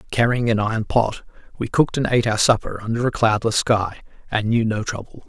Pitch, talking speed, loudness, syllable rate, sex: 110 Hz, 205 wpm, -20 LUFS, 6.0 syllables/s, male